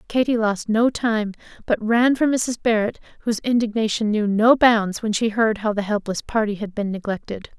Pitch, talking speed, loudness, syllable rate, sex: 220 Hz, 190 wpm, -21 LUFS, 5.0 syllables/s, female